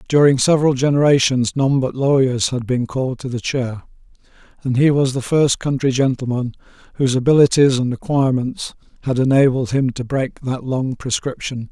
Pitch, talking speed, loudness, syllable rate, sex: 130 Hz, 160 wpm, -17 LUFS, 5.3 syllables/s, male